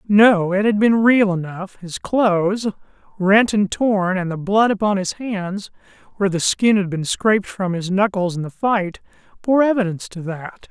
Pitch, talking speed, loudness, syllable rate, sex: 200 Hz, 185 wpm, -18 LUFS, 4.5 syllables/s, male